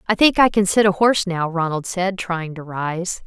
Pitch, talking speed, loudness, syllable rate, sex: 185 Hz, 240 wpm, -19 LUFS, 4.8 syllables/s, female